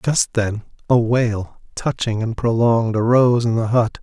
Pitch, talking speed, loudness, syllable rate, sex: 115 Hz, 165 wpm, -18 LUFS, 4.4 syllables/s, male